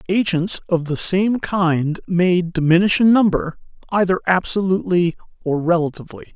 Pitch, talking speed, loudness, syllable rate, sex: 175 Hz, 125 wpm, -18 LUFS, 4.9 syllables/s, male